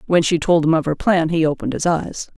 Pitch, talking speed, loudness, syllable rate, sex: 165 Hz, 275 wpm, -18 LUFS, 6.1 syllables/s, female